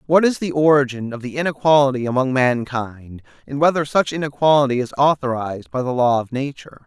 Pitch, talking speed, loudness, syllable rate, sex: 135 Hz, 175 wpm, -18 LUFS, 5.9 syllables/s, male